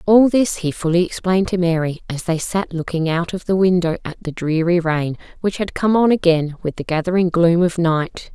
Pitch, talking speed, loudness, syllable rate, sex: 175 Hz, 215 wpm, -18 LUFS, 5.2 syllables/s, female